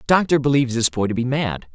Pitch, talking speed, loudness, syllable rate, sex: 130 Hz, 275 wpm, -19 LUFS, 6.6 syllables/s, male